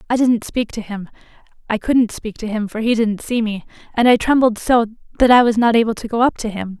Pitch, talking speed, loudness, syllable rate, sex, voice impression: 225 Hz, 245 wpm, -17 LUFS, 5.8 syllables/s, female, very feminine, slightly middle-aged, thin, slightly tensed, slightly weak, bright, slightly soft, very clear, very fluent, raspy, very cute, intellectual, very refreshing, sincere, very calm, friendly, reassuring, unique, very elegant, slightly wild, sweet, lively, kind, slightly intense, light